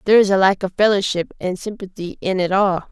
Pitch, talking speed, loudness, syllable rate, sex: 190 Hz, 225 wpm, -18 LUFS, 6.1 syllables/s, female